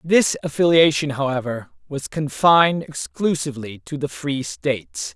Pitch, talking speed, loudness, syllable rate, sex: 145 Hz, 115 wpm, -20 LUFS, 4.6 syllables/s, male